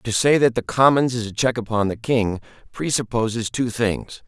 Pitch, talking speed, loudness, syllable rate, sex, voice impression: 115 Hz, 195 wpm, -20 LUFS, 4.8 syllables/s, male, masculine, adult-like, slightly relaxed, bright, fluent, sincere, calm, reassuring, kind, modest